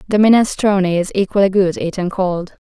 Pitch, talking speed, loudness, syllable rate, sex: 195 Hz, 155 wpm, -16 LUFS, 5.5 syllables/s, female